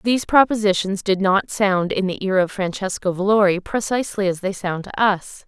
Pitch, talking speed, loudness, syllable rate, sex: 195 Hz, 185 wpm, -20 LUFS, 5.3 syllables/s, female